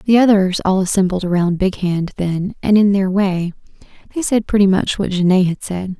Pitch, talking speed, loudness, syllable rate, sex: 190 Hz, 200 wpm, -16 LUFS, 4.9 syllables/s, female